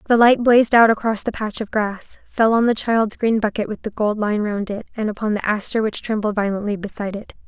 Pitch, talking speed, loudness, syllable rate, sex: 215 Hz, 240 wpm, -19 LUFS, 5.7 syllables/s, female